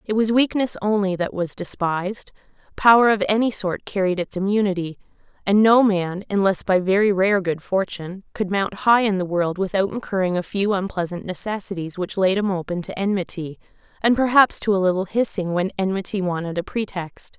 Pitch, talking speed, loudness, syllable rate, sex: 195 Hz, 180 wpm, -21 LUFS, 5.3 syllables/s, female